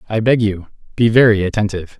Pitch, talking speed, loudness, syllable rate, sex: 105 Hz, 180 wpm, -15 LUFS, 6.2 syllables/s, male